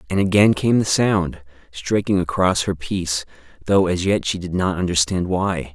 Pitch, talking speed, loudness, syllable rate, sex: 90 Hz, 180 wpm, -19 LUFS, 4.7 syllables/s, male